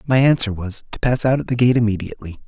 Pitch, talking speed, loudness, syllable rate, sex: 115 Hz, 240 wpm, -18 LUFS, 6.6 syllables/s, male